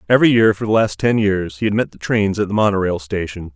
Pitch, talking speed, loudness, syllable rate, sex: 100 Hz, 270 wpm, -17 LUFS, 6.3 syllables/s, male